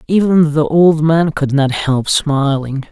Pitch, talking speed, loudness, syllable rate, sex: 150 Hz, 165 wpm, -13 LUFS, 3.7 syllables/s, male